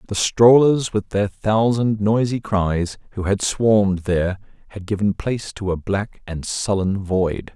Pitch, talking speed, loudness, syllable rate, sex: 100 Hz, 160 wpm, -20 LUFS, 4.1 syllables/s, male